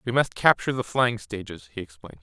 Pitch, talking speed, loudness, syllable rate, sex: 115 Hz, 215 wpm, -24 LUFS, 6.3 syllables/s, male